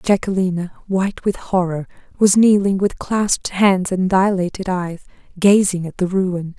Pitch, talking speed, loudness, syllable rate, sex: 190 Hz, 145 wpm, -18 LUFS, 4.6 syllables/s, female